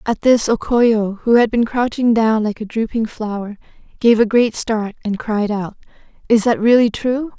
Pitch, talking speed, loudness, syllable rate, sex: 225 Hz, 195 wpm, -16 LUFS, 4.5 syllables/s, female